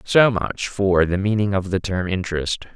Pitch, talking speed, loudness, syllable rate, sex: 95 Hz, 195 wpm, -20 LUFS, 4.6 syllables/s, male